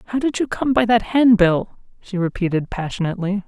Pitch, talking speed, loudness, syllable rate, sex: 205 Hz, 175 wpm, -19 LUFS, 5.9 syllables/s, female